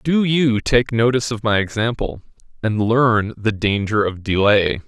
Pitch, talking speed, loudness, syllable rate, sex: 110 Hz, 160 wpm, -18 LUFS, 4.4 syllables/s, male